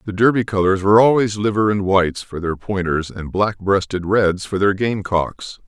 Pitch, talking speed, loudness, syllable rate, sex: 100 Hz, 200 wpm, -18 LUFS, 4.9 syllables/s, male